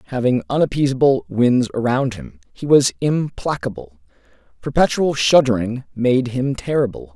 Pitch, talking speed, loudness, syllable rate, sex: 120 Hz, 110 wpm, -18 LUFS, 4.8 syllables/s, male